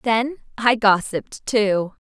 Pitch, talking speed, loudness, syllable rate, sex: 220 Hz, 115 wpm, -20 LUFS, 3.6 syllables/s, female